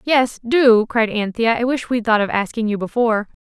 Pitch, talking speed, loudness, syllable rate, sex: 230 Hz, 195 wpm, -18 LUFS, 5.1 syllables/s, female